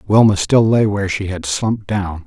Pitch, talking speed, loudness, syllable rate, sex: 100 Hz, 210 wpm, -16 LUFS, 5.2 syllables/s, male